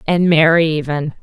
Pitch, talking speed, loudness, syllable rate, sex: 160 Hz, 145 wpm, -14 LUFS, 4.8 syllables/s, female